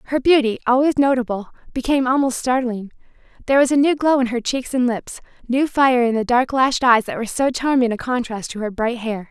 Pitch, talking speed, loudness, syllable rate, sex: 250 Hz, 220 wpm, -18 LUFS, 5.8 syllables/s, female